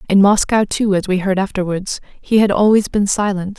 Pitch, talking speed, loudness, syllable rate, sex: 195 Hz, 200 wpm, -16 LUFS, 5.1 syllables/s, female